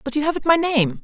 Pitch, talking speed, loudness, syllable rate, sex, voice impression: 285 Hz, 290 wpm, -19 LUFS, 6.5 syllables/s, female, very feminine, very adult-like, very middle-aged, thin, very tensed, very powerful, very bright, very hard, very clear, very fluent, slightly raspy, very cool, very intellectual, very refreshing, sincere, slightly calm, slightly friendly, slightly reassuring, very unique, elegant, wild, slightly sweet, very lively, very strict, very intense, very sharp, slightly light